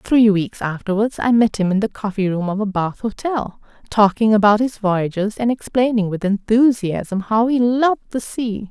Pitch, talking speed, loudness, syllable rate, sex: 215 Hz, 185 wpm, -18 LUFS, 4.7 syllables/s, female